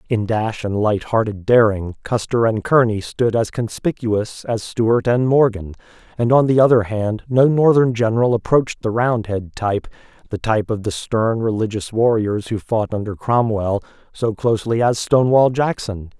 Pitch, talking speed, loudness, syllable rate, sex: 115 Hz, 150 wpm, -18 LUFS, 4.8 syllables/s, male